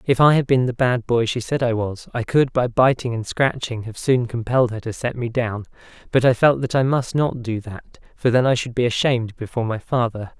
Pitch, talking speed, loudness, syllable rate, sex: 120 Hz, 250 wpm, -20 LUFS, 5.4 syllables/s, male